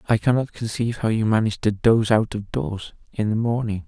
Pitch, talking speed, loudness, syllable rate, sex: 110 Hz, 215 wpm, -22 LUFS, 5.9 syllables/s, male